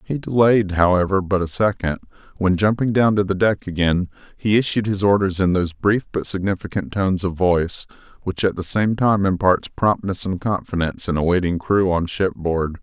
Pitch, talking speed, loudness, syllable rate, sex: 95 Hz, 185 wpm, -20 LUFS, 5.3 syllables/s, male